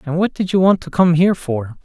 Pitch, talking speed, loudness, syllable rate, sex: 170 Hz, 295 wpm, -16 LUFS, 5.9 syllables/s, male